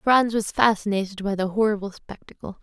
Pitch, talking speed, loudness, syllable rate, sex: 205 Hz, 160 wpm, -22 LUFS, 5.4 syllables/s, female